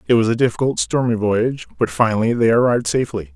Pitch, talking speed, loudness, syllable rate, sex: 115 Hz, 195 wpm, -18 LUFS, 6.8 syllables/s, male